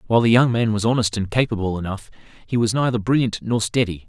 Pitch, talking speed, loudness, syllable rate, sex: 110 Hz, 220 wpm, -20 LUFS, 6.6 syllables/s, male